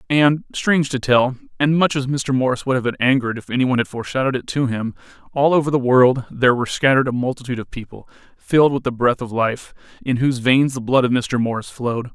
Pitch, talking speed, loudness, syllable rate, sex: 130 Hz, 230 wpm, -18 LUFS, 6.6 syllables/s, male